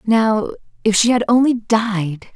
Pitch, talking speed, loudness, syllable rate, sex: 220 Hz, 125 wpm, -17 LUFS, 3.9 syllables/s, female